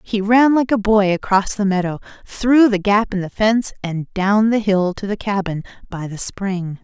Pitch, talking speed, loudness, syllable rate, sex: 200 Hz, 210 wpm, -17 LUFS, 4.6 syllables/s, female